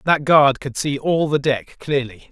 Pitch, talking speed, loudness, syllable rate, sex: 140 Hz, 210 wpm, -18 LUFS, 4.2 syllables/s, male